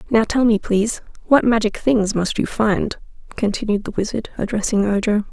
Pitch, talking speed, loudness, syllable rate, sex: 215 Hz, 170 wpm, -19 LUFS, 5.1 syllables/s, female